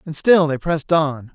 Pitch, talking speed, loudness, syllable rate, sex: 155 Hz, 225 wpm, -17 LUFS, 4.9 syllables/s, male